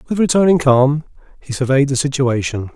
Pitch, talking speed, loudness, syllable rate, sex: 140 Hz, 155 wpm, -15 LUFS, 5.6 syllables/s, male